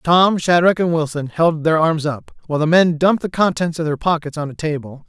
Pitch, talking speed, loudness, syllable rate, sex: 160 Hz, 235 wpm, -17 LUFS, 5.5 syllables/s, male